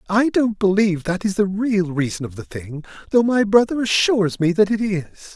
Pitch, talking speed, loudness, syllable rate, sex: 195 Hz, 215 wpm, -19 LUFS, 5.5 syllables/s, male